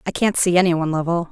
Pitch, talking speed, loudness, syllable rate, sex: 170 Hz, 275 wpm, -18 LUFS, 7.6 syllables/s, female